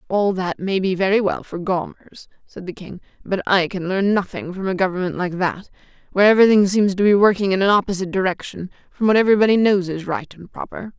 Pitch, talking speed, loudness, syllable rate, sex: 190 Hz, 220 wpm, -18 LUFS, 6.1 syllables/s, female